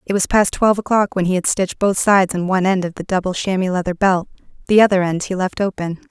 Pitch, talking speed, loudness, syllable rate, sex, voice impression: 190 Hz, 255 wpm, -17 LUFS, 6.6 syllables/s, female, very feminine, adult-like, thin, tensed, powerful, bright, slightly soft, clear, fluent, slightly raspy, cool, very intellectual, refreshing, sincere, slightly calm, friendly, very reassuring, unique, slightly elegant, slightly wild, sweet, lively, kind, slightly intense, slightly modest, slightly light